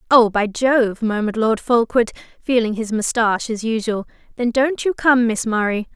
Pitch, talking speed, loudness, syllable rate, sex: 230 Hz, 170 wpm, -18 LUFS, 5.1 syllables/s, female